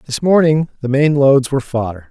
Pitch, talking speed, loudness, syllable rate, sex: 135 Hz, 200 wpm, -14 LUFS, 5.5 syllables/s, male